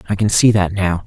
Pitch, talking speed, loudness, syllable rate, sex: 95 Hz, 280 wpm, -15 LUFS, 5.8 syllables/s, male